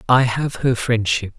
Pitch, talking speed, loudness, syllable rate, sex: 120 Hz, 175 wpm, -19 LUFS, 4.1 syllables/s, male